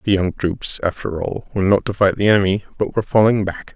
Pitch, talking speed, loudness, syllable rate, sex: 100 Hz, 240 wpm, -18 LUFS, 6.1 syllables/s, male